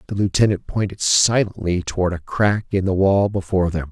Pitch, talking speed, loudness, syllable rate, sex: 95 Hz, 185 wpm, -19 LUFS, 5.4 syllables/s, male